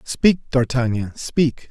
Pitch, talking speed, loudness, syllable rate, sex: 135 Hz, 105 wpm, -20 LUFS, 3.4 syllables/s, male